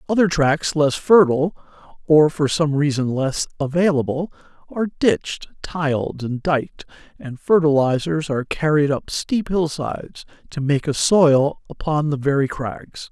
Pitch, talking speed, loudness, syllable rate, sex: 150 Hz, 135 wpm, -19 LUFS, 4.5 syllables/s, male